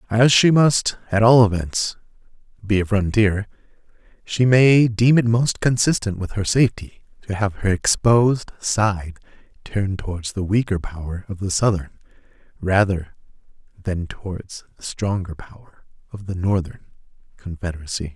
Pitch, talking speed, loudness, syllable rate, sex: 100 Hz, 135 wpm, -20 LUFS, 4.7 syllables/s, male